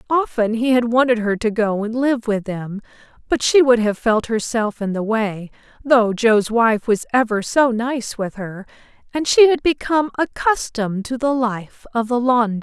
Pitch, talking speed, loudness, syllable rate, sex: 235 Hz, 190 wpm, -18 LUFS, 3.9 syllables/s, female